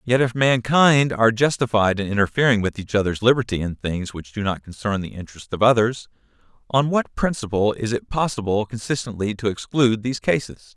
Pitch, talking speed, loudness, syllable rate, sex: 115 Hz, 180 wpm, -21 LUFS, 5.7 syllables/s, male